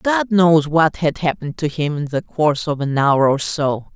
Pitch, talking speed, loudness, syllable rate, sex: 155 Hz, 230 wpm, -18 LUFS, 4.6 syllables/s, female